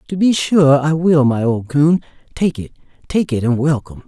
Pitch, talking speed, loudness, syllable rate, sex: 150 Hz, 205 wpm, -16 LUFS, 5.0 syllables/s, male